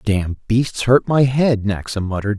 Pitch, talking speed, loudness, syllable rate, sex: 115 Hz, 150 wpm, -18 LUFS, 3.9 syllables/s, male